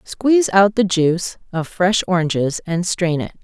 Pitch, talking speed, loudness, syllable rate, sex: 180 Hz, 175 wpm, -18 LUFS, 4.6 syllables/s, female